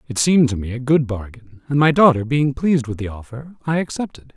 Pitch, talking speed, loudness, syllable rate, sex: 130 Hz, 235 wpm, -18 LUFS, 5.9 syllables/s, male